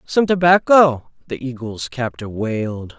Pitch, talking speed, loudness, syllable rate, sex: 135 Hz, 120 wpm, -18 LUFS, 4.1 syllables/s, male